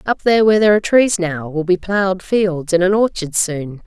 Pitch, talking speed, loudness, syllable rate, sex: 185 Hz, 235 wpm, -16 LUFS, 5.6 syllables/s, female